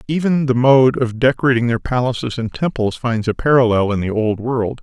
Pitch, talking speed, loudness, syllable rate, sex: 120 Hz, 200 wpm, -17 LUFS, 5.4 syllables/s, male